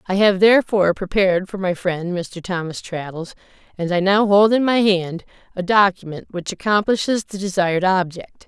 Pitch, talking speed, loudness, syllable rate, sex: 190 Hz, 170 wpm, -18 LUFS, 5.2 syllables/s, female